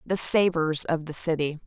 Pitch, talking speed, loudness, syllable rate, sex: 165 Hz, 180 wpm, -21 LUFS, 4.7 syllables/s, female